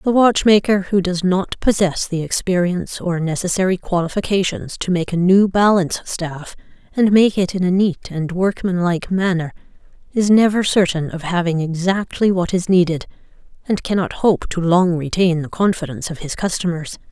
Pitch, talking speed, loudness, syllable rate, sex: 180 Hz, 160 wpm, -18 LUFS, 5.2 syllables/s, female